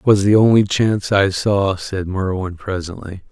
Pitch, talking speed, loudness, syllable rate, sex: 95 Hz, 165 wpm, -17 LUFS, 4.4 syllables/s, male